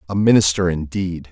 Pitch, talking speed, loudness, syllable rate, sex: 90 Hz, 135 wpm, -17 LUFS, 5.4 syllables/s, male